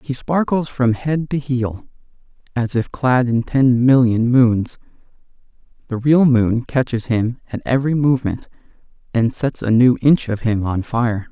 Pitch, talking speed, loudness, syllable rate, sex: 125 Hz, 160 wpm, -17 LUFS, 4.3 syllables/s, male